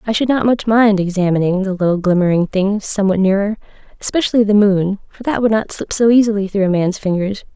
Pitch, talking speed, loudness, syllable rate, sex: 200 Hz, 205 wpm, -15 LUFS, 6.0 syllables/s, female